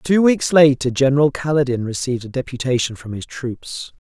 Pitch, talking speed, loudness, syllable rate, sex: 135 Hz, 160 wpm, -18 LUFS, 5.4 syllables/s, male